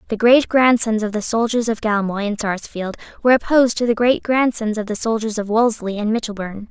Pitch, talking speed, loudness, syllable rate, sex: 220 Hz, 190 wpm, -18 LUFS, 5.8 syllables/s, female